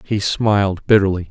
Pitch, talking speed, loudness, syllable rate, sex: 100 Hz, 140 wpm, -16 LUFS, 5.0 syllables/s, male